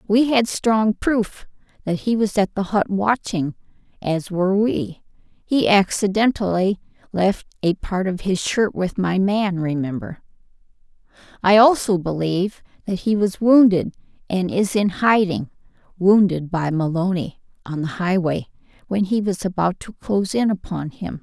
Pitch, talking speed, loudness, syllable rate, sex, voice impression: 195 Hz, 145 wpm, -20 LUFS, 4.3 syllables/s, female, feminine, adult-like, slightly bright, halting, calm, friendly, unique, slightly kind, modest